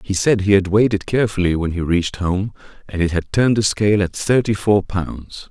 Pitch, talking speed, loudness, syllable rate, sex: 100 Hz, 230 wpm, -18 LUFS, 5.7 syllables/s, male